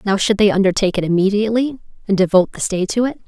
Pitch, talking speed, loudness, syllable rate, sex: 200 Hz, 220 wpm, -17 LUFS, 7.3 syllables/s, female